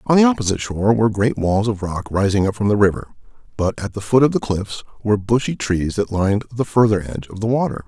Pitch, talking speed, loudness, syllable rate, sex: 105 Hz, 245 wpm, -19 LUFS, 6.6 syllables/s, male